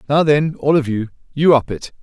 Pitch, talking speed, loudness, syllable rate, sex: 145 Hz, 235 wpm, -16 LUFS, 5.1 syllables/s, male